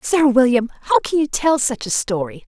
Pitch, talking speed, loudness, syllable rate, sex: 255 Hz, 210 wpm, -18 LUFS, 5.0 syllables/s, female